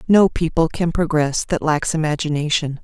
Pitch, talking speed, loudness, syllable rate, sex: 160 Hz, 150 wpm, -19 LUFS, 4.9 syllables/s, female